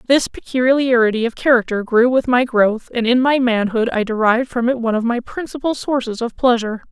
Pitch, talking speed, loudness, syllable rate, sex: 240 Hz, 200 wpm, -17 LUFS, 5.7 syllables/s, female